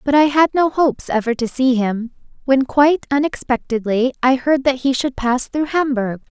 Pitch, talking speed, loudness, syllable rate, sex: 265 Hz, 190 wpm, -17 LUFS, 4.9 syllables/s, female